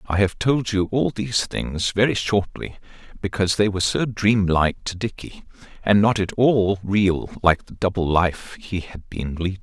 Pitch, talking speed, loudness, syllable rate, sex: 100 Hz, 185 wpm, -21 LUFS, 4.6 syllables/s, male